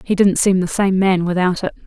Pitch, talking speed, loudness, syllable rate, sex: 190 Hz, 255 wpm, -16 LUFS, 5.5 syllables/s, female